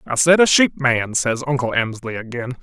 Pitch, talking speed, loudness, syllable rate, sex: 130 Hz, 205 wpm, -17 LUFS, 5.2 syllables/s, male